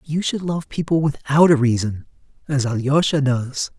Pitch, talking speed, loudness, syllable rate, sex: 145 Hz, 160 wpm, -19 LUFS, 4.6 syllables/s, male